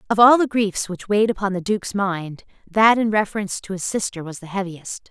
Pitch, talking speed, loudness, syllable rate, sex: 200 Hz, 225 wpm, -20 LUFS, 5.7 syllables/s, female